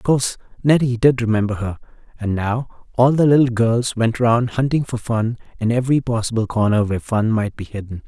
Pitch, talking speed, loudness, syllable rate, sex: 115 Hz, 195 wpm, -19 LUFS, 5.6 syllables/s, male